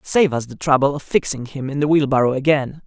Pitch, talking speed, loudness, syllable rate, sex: 140 Hz, 230 wpm, -19 LUFS, 5.8 syllables/s, male